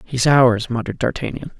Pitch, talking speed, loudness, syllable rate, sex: 125 Hz, 150 wpm, -18 LUFS, 5.6 syllables/s, male